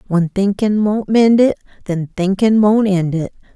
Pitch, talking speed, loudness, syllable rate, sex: 200 Hz, 170 wpm, -15 LUFS, 4.2 syllables/s, female